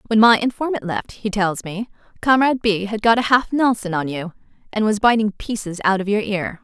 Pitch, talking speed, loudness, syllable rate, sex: 210 Hz, 215 wpm, -19 LUFS, 5.4 syllables/s, female